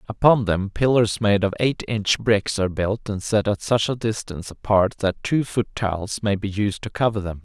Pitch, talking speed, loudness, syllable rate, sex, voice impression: 105 Hz, 220 wpm, -22 LUFS, 5.0 syllables/s, male, very masculine, very adult-like, very middle-aged, very thick, slightly tensed, powerful, slightly bright, slightly hard, slightly muffled, slightly fluent, cool, intellectual, sincere, very calm, mature, very friendly, reassuring, slightly unique, wild, sweet, slightly lively, kind, slightly modest